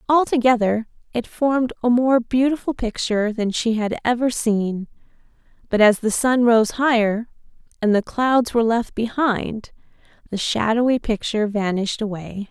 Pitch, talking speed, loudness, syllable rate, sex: 230 Hz, 140 wpm, -20 LUFS, 4.8 syllables/s, female